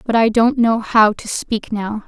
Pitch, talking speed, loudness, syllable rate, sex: 225 Hz, 230 wpm, -16 LUFS, 4.1 syllables/s, female